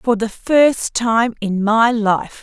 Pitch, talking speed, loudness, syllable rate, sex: 225 Hz, 175 wpm, -16 LUFS, 3.0 syllables/s, female